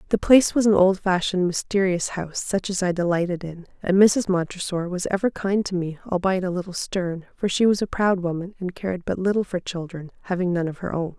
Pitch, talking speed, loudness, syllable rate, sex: 185 Hz, 220 wpm, -23 LUFS, 5.8 syllables/s, female